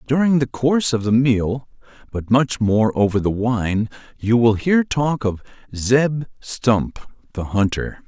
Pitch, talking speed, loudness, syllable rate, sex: 120 Hz, 140 wpm, -19 LUFS, 3.9 syllables/s, male